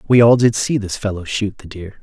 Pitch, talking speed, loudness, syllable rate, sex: 105 Hz, 265 wpm, -16 LUFS, 5.6 syllables/s, male